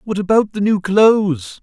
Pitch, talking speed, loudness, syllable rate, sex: 195 Hz, 185 wpm, -15 LUFS, 4.6 syllables/s, male